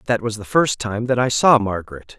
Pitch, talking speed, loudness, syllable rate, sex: 115 Hz, 250 wpm, -18 LUFS, 5.4 syllables/s, male